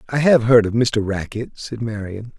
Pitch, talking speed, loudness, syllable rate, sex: 115 Hz, 200 wpm, -18 LUFS, 4.7 syllables/s, male